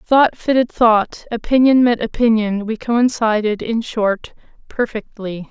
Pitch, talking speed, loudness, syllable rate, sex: 225 Hz, 120 wpm, -17 LUFS, 4.0 syllables/s, female